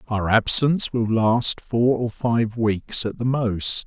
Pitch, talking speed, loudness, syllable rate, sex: 115 Hz, 170 wpm, -21 LUFS, 3.5 syllables/s, male